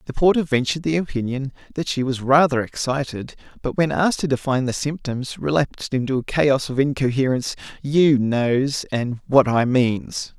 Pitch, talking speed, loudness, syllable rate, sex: 135 Hz, 170 wpm, -21 LUFS, 5.0 syllables/s, male